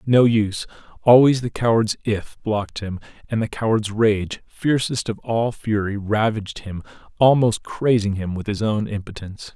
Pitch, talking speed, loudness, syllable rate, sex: 110 Hz, 145 wpm, -20 LUFS, 4.8 syllables/s, male